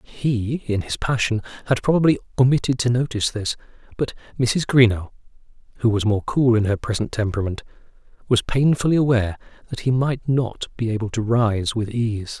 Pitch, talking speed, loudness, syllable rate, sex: 115 Hz, 165 wpm, -21 LUFS, 5.5 syllables/s, male